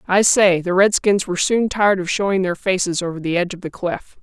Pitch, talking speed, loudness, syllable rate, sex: 190 Hz, 240 wpm, -18 LUFS, 5.9 syllables/s, female